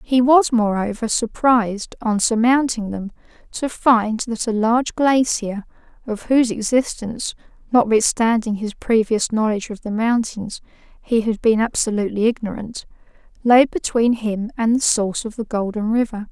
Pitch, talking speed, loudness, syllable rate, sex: 225 Hz, 140 wpm, -19 LUFS, 4.8 syllables/s, female